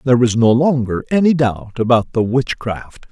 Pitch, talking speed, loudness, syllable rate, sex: 120 Hz, 175 wpm, -16 LUFS, 4.8 syllables/s, male